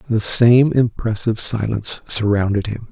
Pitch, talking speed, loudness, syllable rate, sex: 110 Hz, 125 wpm, -17 LUFS, 4.9 syllables/s, male